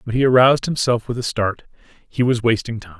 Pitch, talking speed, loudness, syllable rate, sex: 115 Hz, 180 wpm, -18 LUFS, 6.0 syllables/s, male